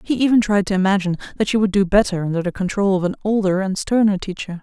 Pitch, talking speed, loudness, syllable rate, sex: 200 Hz, 245 wpm, -19 LUFS, 6.8 syllables/s, female